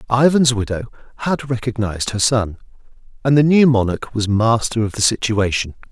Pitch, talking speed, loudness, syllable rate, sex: 115 Hz, 150 wpm, -17 LUFS, 5.4 syllables/s, male